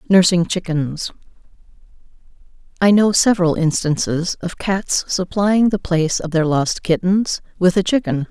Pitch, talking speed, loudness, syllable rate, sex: 180 Hz, 125 wpm, -17 LUFS, 4.5 syllables/s, female